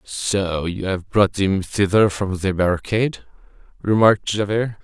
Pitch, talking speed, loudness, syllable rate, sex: 100 Hz, 135 wpm, -20 LUFS, 4.4 syllables/s, male